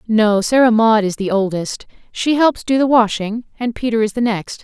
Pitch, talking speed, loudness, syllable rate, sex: 225 Hz, 195 wpm, -16 LUFS, 4.9 syllables/s, female